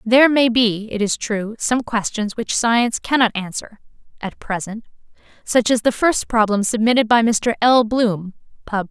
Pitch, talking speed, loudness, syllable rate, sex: 225 Hz, 155 wpm, -18 LUFS, 4.6 syllables/s, female